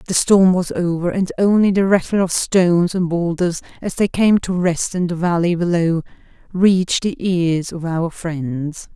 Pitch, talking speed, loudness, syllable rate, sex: 175 Hz, 180 wpm, -17 LUFS, 4.4 syllables/s, female